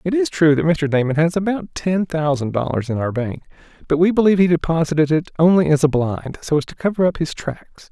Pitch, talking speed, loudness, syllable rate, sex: 160 Hz, 235 wpm, -18 LUFS, 5.8 syllables/s, male